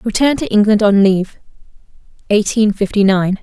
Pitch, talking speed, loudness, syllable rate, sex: 210 Hz, 140 wpm, -13 LUFS, 5.9 syllables/s, female